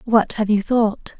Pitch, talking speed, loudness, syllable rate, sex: 215 Hz, 200 wpm, -19 LUFS, 3.7 syllables/s, female